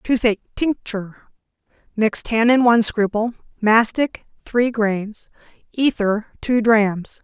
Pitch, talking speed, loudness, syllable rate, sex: 225 Hz, 90 wpm, -19 LUFS, 3.9 syllables/s, female